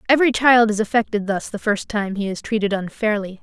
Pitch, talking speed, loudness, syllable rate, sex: 215 Hz, 210 wpm, -19 LUFS, 5.9 syllables/s, female